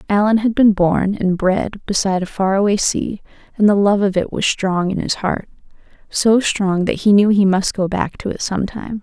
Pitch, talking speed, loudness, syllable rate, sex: 200 Hz, 205 wpm, -17 LUFS, 5.1 syllables/s, female